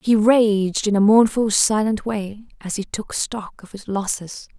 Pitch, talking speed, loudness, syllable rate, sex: 210 Hz, 185 wpm, -19 LUFS, 4.0 syllables/s, female